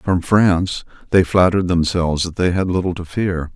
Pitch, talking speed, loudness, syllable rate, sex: 90 Hz, 185 wpm, -17 LUFS, 5.3 syllables/s, male